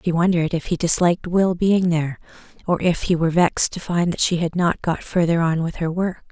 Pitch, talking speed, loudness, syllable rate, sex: 170 Hz, 240 wpm, -20 LUFS, 5.8 syllables/s, female